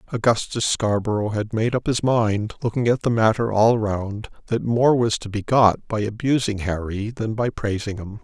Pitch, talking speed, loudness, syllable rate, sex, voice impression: 110 Hz, 190 wpm, -21 LUFS, 4.7 syllables/s, male, masculine, middle-aged, slightly relaxed, powerful, muffled, slightly halting, raspy, calm, mature, wild, strict